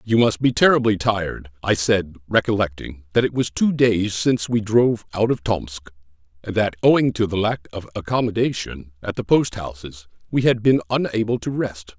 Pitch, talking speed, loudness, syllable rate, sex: 105 Hz, 185 wpm, -20 LUFS, 5.1 syllables/s, male